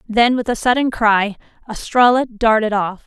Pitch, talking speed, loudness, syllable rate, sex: 225 Hz, 155 wpm, -16 LUFS, 4.7 syllables/s, female